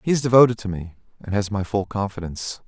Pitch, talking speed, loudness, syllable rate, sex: 105 Hz, 225 wpm, -21 LUFS, 6.5 syllables/s, male